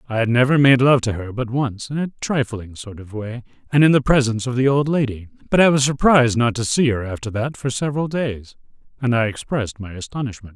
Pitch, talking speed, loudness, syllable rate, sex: 125 Hz, 235 wpm, -19 LUFS, 6.0 syllables/s, male